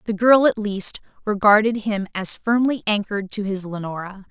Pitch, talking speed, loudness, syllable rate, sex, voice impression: 205 Hz, 165 wpm, -20 LUFS, 5.0 syllables/s, female, feminine, adult-like, tensed, powerful, bright, clear, fluent, intellectual, friendly, lively, slightly intense, sharp